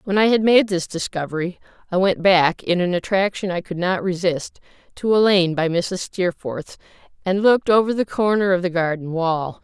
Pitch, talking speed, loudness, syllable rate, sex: 185 Hz, 195 wpm, -20 LUFS, 5.0 syllables/s, female